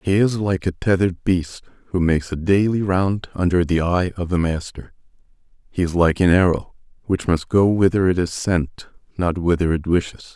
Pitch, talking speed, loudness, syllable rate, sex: 90 Hz, 190 wpm, -19 LUFS, 5.0 syllables/s, male